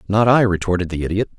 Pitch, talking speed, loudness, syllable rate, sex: 100 Hz, 215 wpm, -18 LUFS, 6.9 syllables/s, male